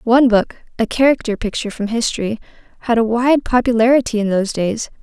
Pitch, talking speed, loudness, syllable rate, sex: 230 Hz, 165 wpm, -16 LUFS, 6.2 syllables/s, female